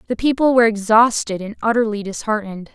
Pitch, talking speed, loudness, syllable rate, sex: 220 Hz, 155 wpm, -17 LUFS, 6.5 syllables/s, female